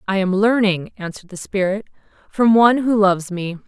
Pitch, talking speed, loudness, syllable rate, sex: 200 Hz, 180 wpm, -17 LUFS, 5.7 syllables/s, female